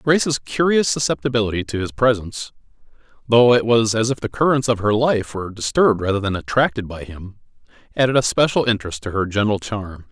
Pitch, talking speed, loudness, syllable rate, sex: 115 Hz, 185 wpm, -19 LUFS, 6.1 syllables/s, male